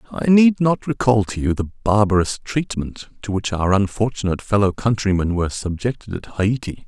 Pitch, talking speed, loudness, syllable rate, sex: 105 Hz, 165 wpm, -19 LUFS, 5.2 syllables/s, male